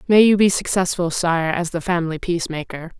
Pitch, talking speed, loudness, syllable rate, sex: 175 Hz, 180 wpm, -19 LUFS, 5.7 syllables/s, female